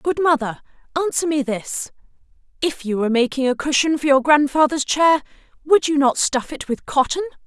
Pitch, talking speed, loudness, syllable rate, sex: 290 Hz, 175 wpm, -19 LUFS, 5.2 syllables/s, female